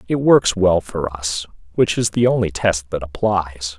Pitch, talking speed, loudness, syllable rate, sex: 95 Hz, 190 wpm, -18 LUFS, 4.2 syllables/s, male